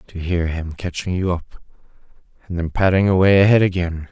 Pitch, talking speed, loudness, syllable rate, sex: 90 Hz, 175 wpm, -18 LUFS, 5.5 syllables/s, male